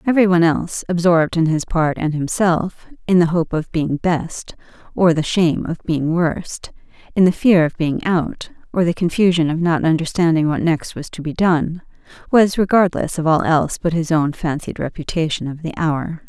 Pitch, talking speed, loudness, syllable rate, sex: 165 Hz, 190 wpm, -18 LUFS, 5.0 syllables/s, female